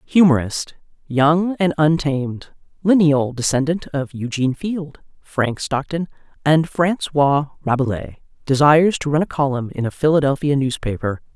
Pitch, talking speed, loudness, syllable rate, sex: 145 Hz, 120 wpm, -19 LUFS, 4.6 syllables/s, female